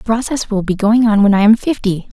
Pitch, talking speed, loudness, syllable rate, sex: 215 Hz, 275 wpm, -14 LUFS, 5.7 syllables/s, female